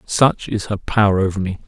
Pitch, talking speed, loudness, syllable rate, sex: 100 Hz, 215 wpm, -18 LUFS, 5.3 syllables/s, male